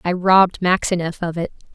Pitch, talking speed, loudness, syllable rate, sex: 180 Hz, 170 wpm, -18 LUFS, 5.8 syllables/s, female